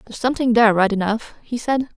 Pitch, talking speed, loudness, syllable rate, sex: 230 Hz, 210 wpm, -19 LUFS, 7.3 syllables/s, female